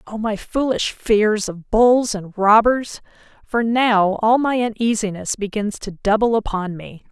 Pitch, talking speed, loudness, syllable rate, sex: 215 Hz, 145 wpm, -18 LUFS, 4.1 syllables/s, female